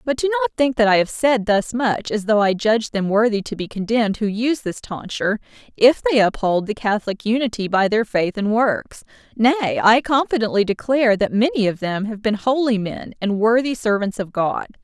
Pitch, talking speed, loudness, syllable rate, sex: 220 Hz, 205 wpm, -19 LUFS, 5.4 syllables/s, female